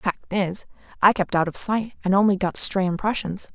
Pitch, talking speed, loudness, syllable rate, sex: 195 Hz, 185 wpm, -21 LUFS, 4.9 syllables/s, female